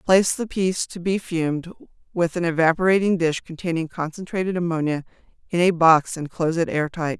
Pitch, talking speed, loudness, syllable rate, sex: 170 Hz, 165 wpm, -22 LUFS, 5.7 syllables/s, female